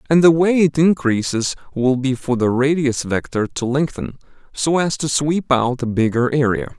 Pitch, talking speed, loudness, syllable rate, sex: 135 Hz, 185 wpm, -18 LUFS, 4.7 syllables/s, male